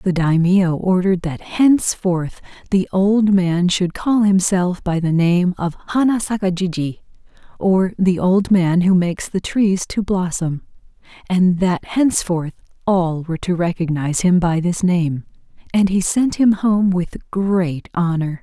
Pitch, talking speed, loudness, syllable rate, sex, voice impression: 185 Hz, 155 wpm, -18 LUFS, 4.2 syllables/s, female, feminine, gender-neutral, very adult-like, very middle-aged, thin, relaxed, weak, bright, very soft, slightly clear, fluent, slightly raspy, cute, cool, very intellectual, very refreshing, sincere, very calm, very friendly, very reassuring, very unique, very elegant, wild, very sweet, lively, very kind, modest, light